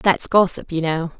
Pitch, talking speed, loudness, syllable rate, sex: 170 Hz, 200 wpm, -19 LUFS, 4.5 syllables/s, female